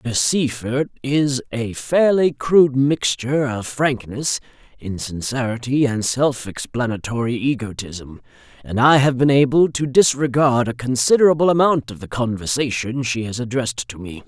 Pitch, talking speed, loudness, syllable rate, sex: 130 Hz, 135 wpm, -19 LUFS, 4.6 syllables/s, male